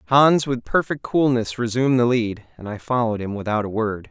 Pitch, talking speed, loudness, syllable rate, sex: 120 Hz, 205 wpm, -21 LUFS, 5.5 syllables/s, male